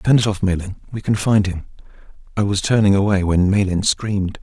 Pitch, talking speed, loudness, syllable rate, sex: 100 Hz, 205 wpm, -18 LUFS, 5.7 syllables/s, male